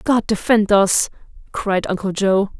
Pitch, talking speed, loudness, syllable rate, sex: 200 Hz, 140 wpm, -18 LUFS, 4.0 syllables/s, female